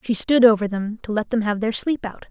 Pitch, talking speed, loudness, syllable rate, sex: 220 Hz, 285 wpm, -20 LUFS, 5.6 syllables/s, female